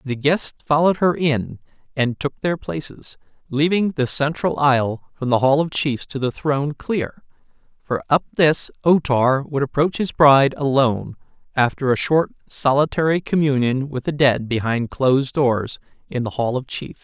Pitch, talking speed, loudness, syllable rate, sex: 140 Hz, 170 wpm, -19 LUFS, 4.6 syllables/s, male